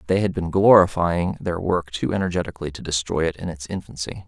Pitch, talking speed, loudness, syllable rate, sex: 85 Hz, 195 wpm, -22 LUFS, 5.9 syllables/s, male